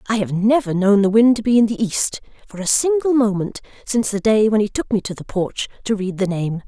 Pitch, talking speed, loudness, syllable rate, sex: 210 Hz, 260 wpm, -18 LUFS, 5.7 syllables/s, female